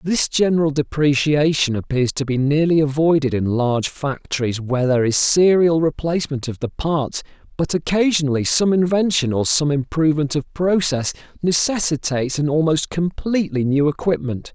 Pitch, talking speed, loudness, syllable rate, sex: 150 Hz, 140 wpm, -19 LUFS, 5.2 syllables/s, male